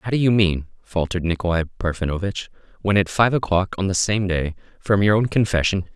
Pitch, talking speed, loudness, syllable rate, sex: 95 Hz, 190 wpm, -21 LUFS, 5.8 syllables/s, male